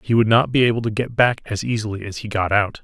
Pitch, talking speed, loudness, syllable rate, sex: 110 Hz, 295 wpm, -19 LUFS, 6.3 syllables/s, male